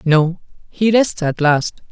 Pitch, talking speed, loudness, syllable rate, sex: 175 Hz, 155 wpm, -16 LUFS, 3.6 syllables/s, male